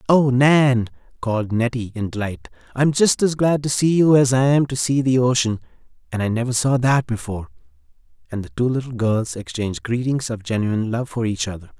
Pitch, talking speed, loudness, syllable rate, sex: 120 Hz, 200 wpm, -20 LUFS, 5.5 syllables/s, male